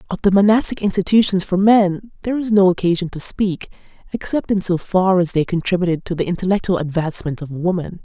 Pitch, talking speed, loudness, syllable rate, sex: 185 Hz, 185 wpm, -17 LUFS, 6.0 syllables/s, female